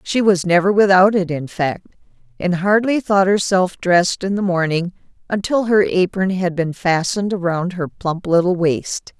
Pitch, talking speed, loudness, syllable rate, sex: 185 Hz, 170 wpm, -17 LUFS, 4.6 syllables/s, female